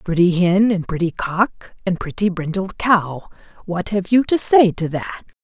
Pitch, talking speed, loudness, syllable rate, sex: 190 Hz, 175 wpm, -18 LUFS, 4.2 syllables/s, female